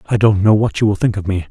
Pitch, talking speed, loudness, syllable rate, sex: 105 Hz, 360 wpm, -15 LUFS, 6.6 syllables/s, male